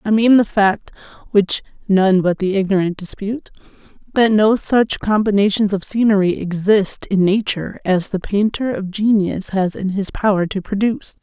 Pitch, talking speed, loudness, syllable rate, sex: 200 Hz, 160 wpm, -17 LUFS, 5.4 syllables/s, female